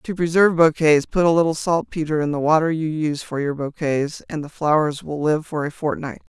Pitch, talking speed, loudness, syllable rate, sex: 155 Hz, 215 wpm, -20 LUFS, 5.5 syllables/s, female